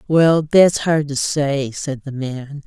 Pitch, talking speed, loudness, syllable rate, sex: 145 Hz, 180 wpm, -17 LUFS, 3.3 syllables/s, female